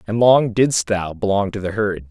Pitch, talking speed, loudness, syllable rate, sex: 105 Hz, 230 wpm, -18 LUFS, 4.6 syllables/s, male